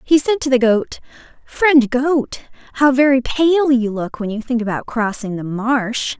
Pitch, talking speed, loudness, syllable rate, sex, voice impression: 250 Hz, 185 wpm, -17 LUFS, 4.1 syllables/s, female, very feminine, slightly young, slightly tensed, slightly cute, slightly unique, lively